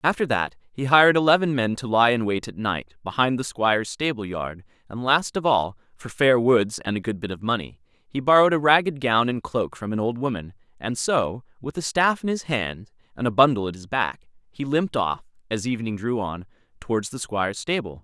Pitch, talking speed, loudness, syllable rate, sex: 120 Hz, 220 wpm, -23 LUFS, 5.4 syllables/s, male